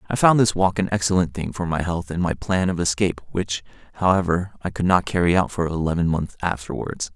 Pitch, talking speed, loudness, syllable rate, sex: 90 Hz, 220 wpm, -22 LUFS, 5.8 syllables/s, male